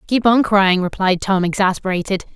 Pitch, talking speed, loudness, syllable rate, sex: 195 Hz, 155 wpm, -17 LUFS, 5.2 syllables/s, female